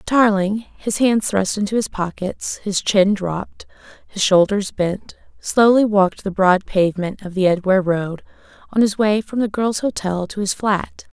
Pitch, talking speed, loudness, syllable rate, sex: 200 Hz, 170 wpm, -18 LUFS, 4.5 syllables/s, female